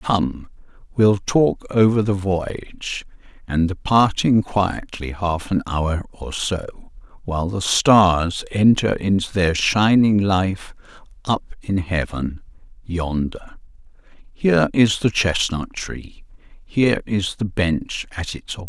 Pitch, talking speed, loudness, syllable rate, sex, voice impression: 95 Hz, 130 wpm, -20 LUFS, 3.6 syllables/s, male, masculine, middle-aged, tensed, powerful, hard, clear, halting, cool, calm, mature, wild, slightly lively, slightly strict